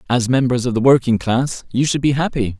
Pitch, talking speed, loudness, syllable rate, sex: 125 Hz, 230 wpm, -17 LUFS, 5.5 syllables/s, male